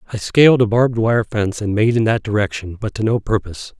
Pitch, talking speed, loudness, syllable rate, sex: 110 Hz, 235 wpm, -17 LUFS, 6.3 syllables/s, male